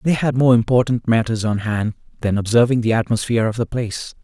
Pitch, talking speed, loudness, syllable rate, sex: 115 Hz, 200 wpm, -18 LUFS, 6.1 syllables/s, male